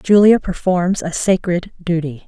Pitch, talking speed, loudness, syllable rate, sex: 180 Hz, 130 wpm, -16 LUFS, 4.1 syllables/s, female